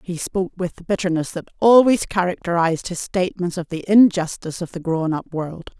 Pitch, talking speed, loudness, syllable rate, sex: 180 Hz, 185 wpm, -20 LUFS, 5.7 syllables/s, female